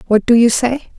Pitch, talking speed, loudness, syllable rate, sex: 240 Hz, 245 wpm, -13 LUFS, 5.2 syllables/s, female